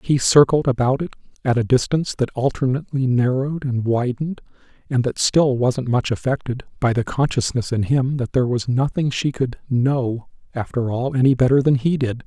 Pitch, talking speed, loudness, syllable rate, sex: 130 Hz, 180 wpm, -20 LUFS, 5.3 syllables/s, male